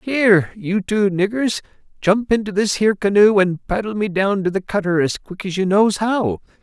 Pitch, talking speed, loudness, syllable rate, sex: 200 Hz, 200 wpm, -18 LUFS, 4.9 syllables/s, male